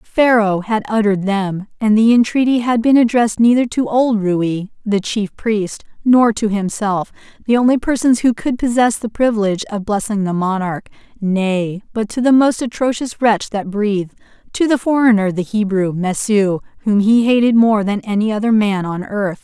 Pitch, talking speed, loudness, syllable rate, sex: 215 Hz, 175 wpm, -16 LUFS, 4.9 syllables/s, female